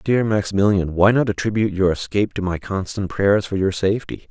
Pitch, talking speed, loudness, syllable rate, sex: 100 Hz, 195 wpm, -20 LUFS, 5.9 syllables/s, male